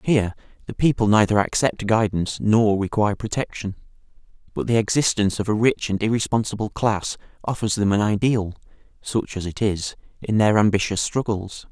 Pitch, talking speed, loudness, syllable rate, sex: 105 Hz, 155 wpm, -21 LUFS, 5.5 syllables/s, male